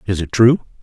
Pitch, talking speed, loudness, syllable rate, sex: 105 Hz, 220 wpm, -15 LUFS, 5.5 syllables/s, male